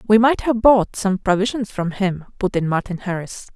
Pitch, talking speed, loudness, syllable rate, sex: 205 Hz, 205 wpm, -19 LUFS, 4.9 syllables/s, female